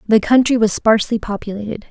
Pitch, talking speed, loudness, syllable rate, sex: 220 Hz, 155 wpm, -16 LUFS, 6.2 syllables/s, female